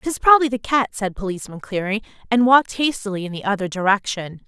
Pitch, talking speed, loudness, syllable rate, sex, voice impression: 215 Hz, 190 wpm, -20 LUFS, 6.4 syllables/s, female, feminine, adult-like, tensed, powerful, clear, intellectual, slightly friendly, slightly unique, lively, sharp